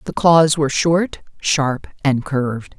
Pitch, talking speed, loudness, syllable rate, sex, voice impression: 145 Hz, 150 wpm, -17 LUFS, 3.9 syllables/s, female, feminine, adult-like, fluent, slightly cool, intellectual, slightly reassuring, elegant, slightly kind